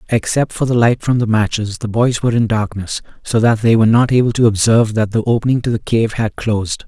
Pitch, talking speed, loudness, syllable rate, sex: 115 Hz, 245 wpm, -15 LUFS, 6.0 syllables/s, male